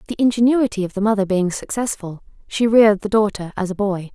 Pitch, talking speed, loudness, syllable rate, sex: 205 Hz, 205 wpm, -18 LUFS, 6.0 syllables/s, female